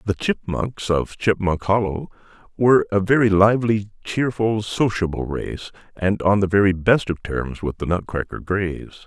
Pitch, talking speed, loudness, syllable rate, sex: 100 Hz, 150 wpm, -20 LUFS, 4.7 syllables/s, male